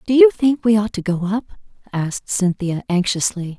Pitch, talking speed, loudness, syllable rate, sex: 205 Hz, 185 wpm, -19 LUFS, 5.1 syllables/s, female